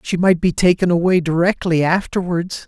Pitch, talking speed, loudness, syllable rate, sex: 175 Hz, 155 wpm, -17 LUFS, 5.1 syllables/s, male